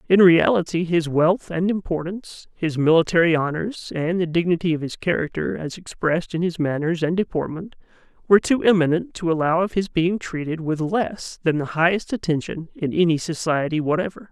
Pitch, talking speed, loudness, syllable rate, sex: 170 Hz, 170 wpm, -21 LUFS, 5.4 syllables/s, male